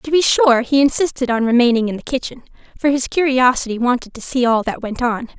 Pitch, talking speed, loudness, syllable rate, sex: 255 Hz, 225 wpm, -16 LUFS, 5.9 syllables/s, female